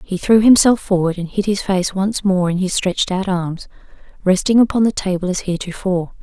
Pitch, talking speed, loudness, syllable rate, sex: 190 Hz, 200 wpm, -17 LUFS, 5.6 syllables/s, female